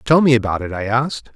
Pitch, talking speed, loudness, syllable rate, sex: 125 Hz, 265 wpm, -17 LUFS, 6.5 syllables/s, male